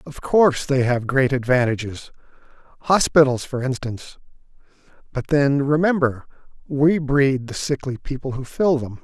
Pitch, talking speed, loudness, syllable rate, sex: 135 Hz, 125 wpm, -20 LUFS, 4.7 syllables/s, male